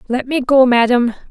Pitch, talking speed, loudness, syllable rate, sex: 250 Hz, 185 wpm, -14 LUFS, 5.0 syllables/s, female